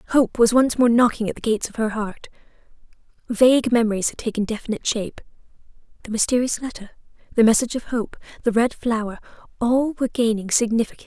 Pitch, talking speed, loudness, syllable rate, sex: 230 Hz, 165 wpm, -21 LUFS, 6.5 syllables/s, female